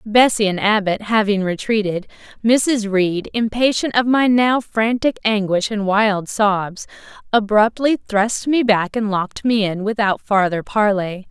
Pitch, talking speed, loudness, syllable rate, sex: 210 Hz, 145 wpm, -18 LUFS, 4.1 syllables/s, female